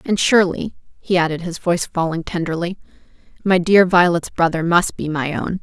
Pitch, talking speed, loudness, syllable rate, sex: 175 Hz, 170 wpm, -18 LUFS, 5.4 syllables/s, female